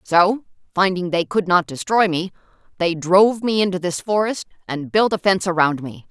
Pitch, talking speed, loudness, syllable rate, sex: 185 Hz, 185 wpm, -19 LUFS, 5.2 syllables/s, female